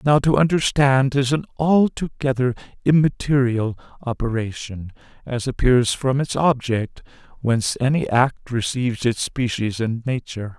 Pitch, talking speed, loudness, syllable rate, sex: 130 Hz, 120 wpm, -20 LUFS, 4.5 syllables/s, male